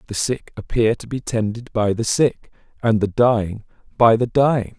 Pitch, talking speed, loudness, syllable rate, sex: 115 Hz, 190 wpm, -19 LUFS, 4.8 syllables/s, male